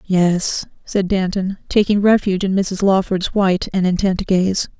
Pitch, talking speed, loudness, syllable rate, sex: 190 Hz, 150 wpm, -17 LUFS, 4.4 syllables/s, female